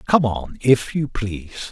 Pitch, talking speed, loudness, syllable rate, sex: 120 Hz, 175 wpm, -21 LUFS, 4.4 syllables/s, male